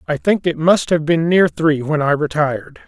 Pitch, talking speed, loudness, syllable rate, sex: 160 Hz, 230 wpm, -16 LUFS, 4.9 syllables/s, male